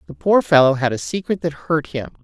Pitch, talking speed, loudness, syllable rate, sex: 155 Hz, 240 wpm, -18 LUFS, 5.5 syllables/s, female